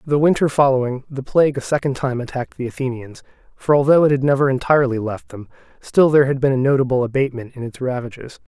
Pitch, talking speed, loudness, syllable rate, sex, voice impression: 135 Hz, 205 wpm, -18 LUFS, 6.7 syllables/s, male, masculine, adult-like, slightly relaxed, slightly weak, muffled, fluent, slightly raspy, slightly intellectual, sincere, friendly, slightly wild, kind, slightly modest